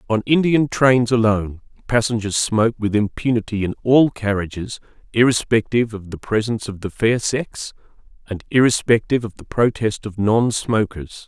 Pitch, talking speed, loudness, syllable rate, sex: 110 Hz, 145 wpm, -19 LUFS, 5.1 syllables/s, male